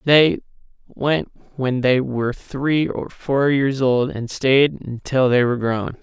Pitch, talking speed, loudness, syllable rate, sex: 130 Hz, 160 wpm, -19 LUFS, 3.5 syllables/s, male